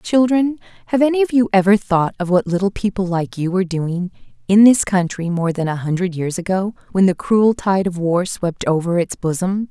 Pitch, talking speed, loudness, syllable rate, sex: 190 Hz, 210 wpm, -17 LUFS, 5.2 syllables/s, female